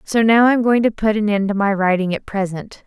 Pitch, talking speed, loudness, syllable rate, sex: 210 Hz, 295 wpm, -17 LUFS, 5.8 syllables/s, female